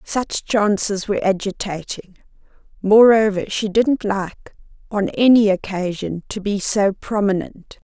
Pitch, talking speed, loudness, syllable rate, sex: 200 Hz, 115 wpm, -18 LUFS, 4.1 syllables/s, female